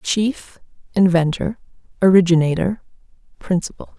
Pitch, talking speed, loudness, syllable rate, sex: 180 Hz, 60 wpm, -18 LUFS, 4.6 syllables/s, female